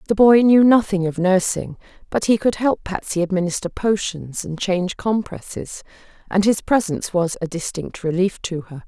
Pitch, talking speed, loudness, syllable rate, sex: 190 Hz, 170 wpm, -19 LUFS, 5.0 syllables/s, female